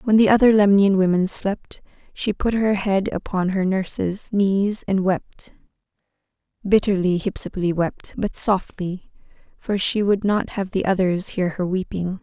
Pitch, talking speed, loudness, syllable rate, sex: 195 Hz, 150 wpm, -21 LUFS, 4.3 syllables/s, female